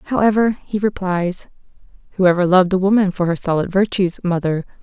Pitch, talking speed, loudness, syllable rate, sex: 190 Hz, 160 wpm, -17 LUFS, 5.7 syllables/s, female